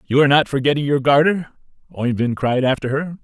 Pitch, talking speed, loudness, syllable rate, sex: 140 Hz, 185 wpm, -18 LUFS, 5.8 syllables/s, male